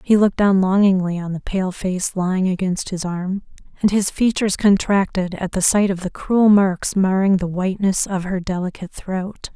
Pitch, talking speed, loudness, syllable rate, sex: 190 Hz, 190 wpm, -19 LUFS, 5.0 syllables/s, female